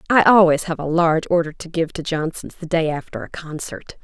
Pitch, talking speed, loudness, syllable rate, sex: 165 Hz, 225 wpm, -19 LUFS, 5.5 syllables/s, female